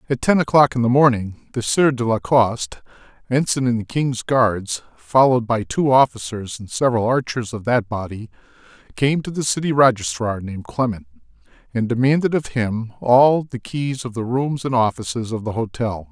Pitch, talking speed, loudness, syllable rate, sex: 120 Hz, 180 wpm, -19 LUFS, 5.1 syllables/s, male